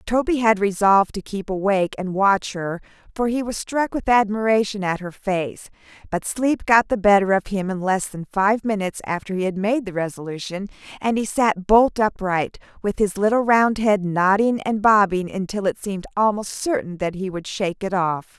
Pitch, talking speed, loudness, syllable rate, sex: 200 Hz, 195 wpm, -21 LUFS, 5.0 syllables/s, female